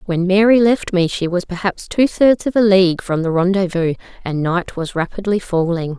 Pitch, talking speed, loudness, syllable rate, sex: 185 Hz, 200 wpm, -16 LUFS, 5.0 syllables/s, female